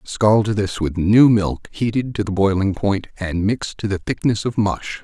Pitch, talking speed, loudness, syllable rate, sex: 100 Hz, 200 wpm, -19 LUFS, 4.2 syllables/s, male